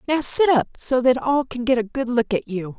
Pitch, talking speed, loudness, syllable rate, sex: 250 Hz, 280 wpm, -20 LUFS, 5.1 syllables/s, female